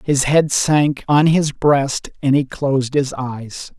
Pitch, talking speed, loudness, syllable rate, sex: 140 Hz, 175 wpm, -17 LUFS, 3.4 syllables/s, male